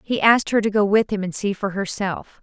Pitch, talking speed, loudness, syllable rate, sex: 205 Hz, 275 wpm, -20 LUFS, 5.6 syllables/s, female